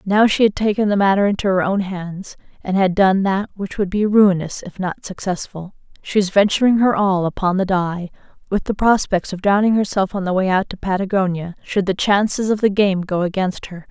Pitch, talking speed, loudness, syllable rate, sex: 195 Hz, 210 wpm, -18 LUFS, 5.3 syllables/s, female